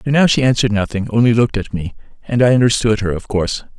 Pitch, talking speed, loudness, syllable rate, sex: 115 Hz, 240 wpm, -16 LUFS, 7.2 syllables/s, male